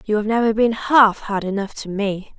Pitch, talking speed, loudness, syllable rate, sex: 215 Hz, 225 wpm, -19 LUFS, 4.8 syllables/s, female